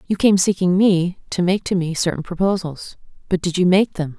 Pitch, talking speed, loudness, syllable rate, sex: 180 Hz, 215 wpm, -18 LUFS, 5.2 syllables/s, female